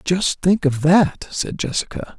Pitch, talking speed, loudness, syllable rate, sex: 170 Hz, 165 wpm, -19 LUFS, 3.9 syllables/s, male